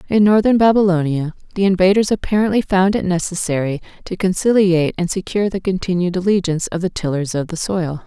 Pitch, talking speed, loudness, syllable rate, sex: 185 Hz, 165 wpm, -17 LUFS, 6.1 syllables/s, female